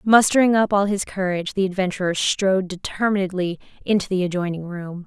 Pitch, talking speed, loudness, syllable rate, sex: 190 Hz, 155 wpm, -21 LUFS, 5.9 syllables/s, female